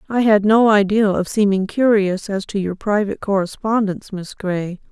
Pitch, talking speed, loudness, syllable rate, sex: 200 Hz, 170 wpm, -18 LUFS, 5.0 syllables/s, female